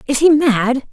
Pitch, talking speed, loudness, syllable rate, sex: 265 Hz, 195 wpm, -14 LUFS, 4.4 syllables/s, female